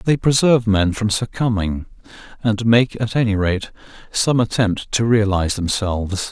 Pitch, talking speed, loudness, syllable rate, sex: 105 Hz, 145 wpm, -18 LUFS, 4.7 syllables/s, male